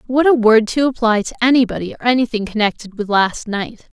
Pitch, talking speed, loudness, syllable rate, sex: 230 Hz, 195 wpm, -16 LUFS, 5.8 syllables/s, female